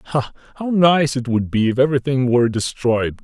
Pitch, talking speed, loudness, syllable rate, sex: 130 Hz, 185 wpm, -18 LUFS, 5.4 syllables/s, male